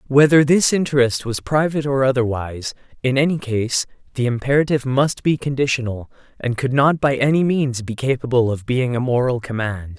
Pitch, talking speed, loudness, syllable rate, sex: 130 Hz, 170 wpm, -19 LUFS, 5.5 syllables/s, male